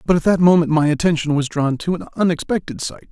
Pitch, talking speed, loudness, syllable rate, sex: 165 Hz, 230 wpm, -18 LUFS, 6.2 syllables/s, male